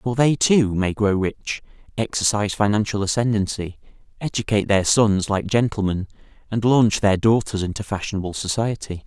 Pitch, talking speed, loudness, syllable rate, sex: 105 Hz, 140 wpm, -21 LUFS, 5.2 syllables/s, male